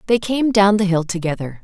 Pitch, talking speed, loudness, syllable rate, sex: 195 Hz, 220 wpm, -17 LUFS, 5.5 syllables/s, female